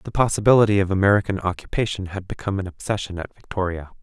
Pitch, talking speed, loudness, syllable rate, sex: 95 Hz, 165 wpm, -22 LUFS, 6.9 syllables/s, male